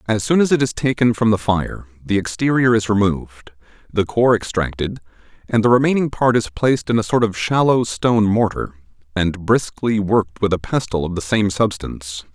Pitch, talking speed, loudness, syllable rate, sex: 110 Hz, 190 wpm, -18 LUFS, 5.3 syllables/s, male